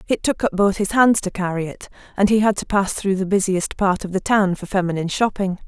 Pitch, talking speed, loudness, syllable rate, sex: 195 Hz, 255 wpm, -19 LUFS, 5.8 syllables/s, female